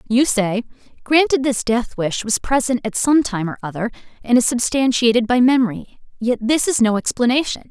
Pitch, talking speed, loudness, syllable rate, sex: 240 Hz, 180 wpm, -18 LUFS, 5.2 syllables/s, female